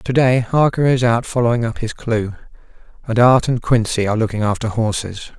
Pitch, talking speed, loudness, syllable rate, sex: 115 Hz, 190 wpm, -17 LUFS, 5.5 syllables/s, male